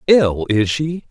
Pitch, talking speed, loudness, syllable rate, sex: 135 Hz, 165 wpm, -17 LUFS, 3.3 syllables/s, male